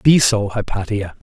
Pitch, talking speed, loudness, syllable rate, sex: 105 Hz, 135 wpm, -18 LUFS, 4.3 syllables/s, male